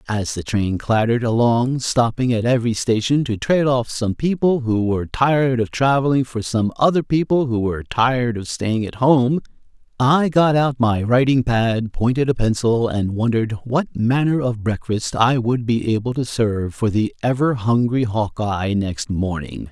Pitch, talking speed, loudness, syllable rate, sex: 120 Hz, 175 wpm, -19 LUFS, 4.7 syllables/s, male